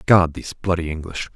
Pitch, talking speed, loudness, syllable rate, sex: 85 Hz, 175 wpm, -22 LUFS, 6.3 syllables/s, male